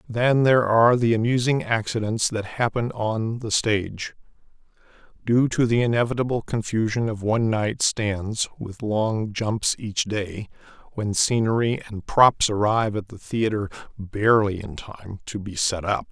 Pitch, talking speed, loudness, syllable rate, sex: 110 Hz, 150 wpm, -22 LUFS, 4.5 syllables/s, male